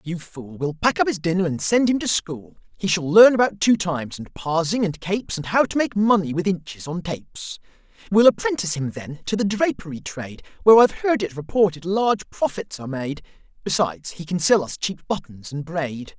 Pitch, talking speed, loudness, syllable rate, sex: 180 Hz, 210 wpm, -21 LUFS, 5.5 syllables/s, male